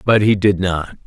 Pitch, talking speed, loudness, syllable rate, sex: 95 Hz, 225 wpm, -16 LUFS, 4.4 syllables/s, male